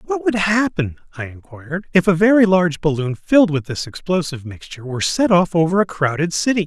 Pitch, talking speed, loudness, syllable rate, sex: 165 Hz, 200 wpm, -17 LUFS, 6.1 syllables/s, male